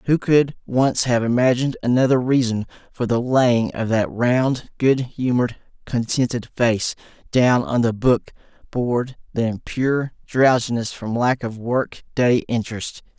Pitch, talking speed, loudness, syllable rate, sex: 120 Hz, 140 wpm, -20 LUFS, 4.1 syllables/s, male